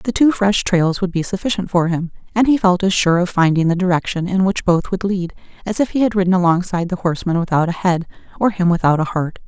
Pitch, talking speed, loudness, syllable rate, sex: 185 Hz, 245 wpm, -17 LUFS, 6.1 syllables/s, female